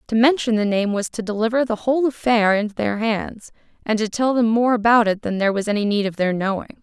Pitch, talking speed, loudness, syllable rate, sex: 220 Hz, 245 wpm, -20 LUFS, 6.0 syllables/s, female